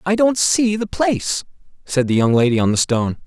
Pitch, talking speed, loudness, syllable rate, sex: 160 Hz, 220 wpm, -17 LUFS, 5.6 syllables/s, male